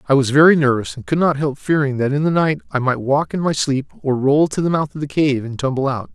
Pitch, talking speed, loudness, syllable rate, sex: 145 Hz, 295 wpm, -18 LUFS, 6.0 syllables/s, male